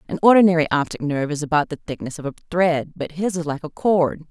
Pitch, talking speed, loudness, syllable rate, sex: 160 Hz, 235 wpm, -20 LUFS, 6.4 syllables/s, female